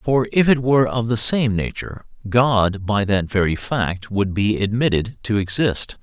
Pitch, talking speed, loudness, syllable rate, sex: 110 Hz, 180 wpm, -19 LUFS, 4.4 syllables/s, male